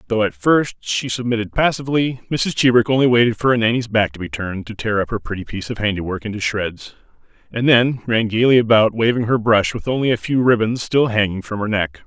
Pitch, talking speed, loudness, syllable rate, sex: 115 Hz, 230 wpm, -18 LUFS, 6.0 syllables/s, male